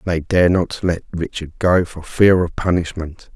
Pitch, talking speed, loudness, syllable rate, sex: 85 Hz, 195 wpm, -18 LUFS, 4.7 syllables/s, male